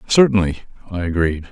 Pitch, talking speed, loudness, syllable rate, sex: 95 Hz, 120 wpm, -18 LUFS, 6.3 syllables/s, male